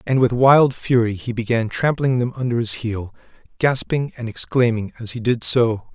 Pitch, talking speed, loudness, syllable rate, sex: 120 Hz, 180 wpm, -19 LUFS, 4.8 syllables/s, male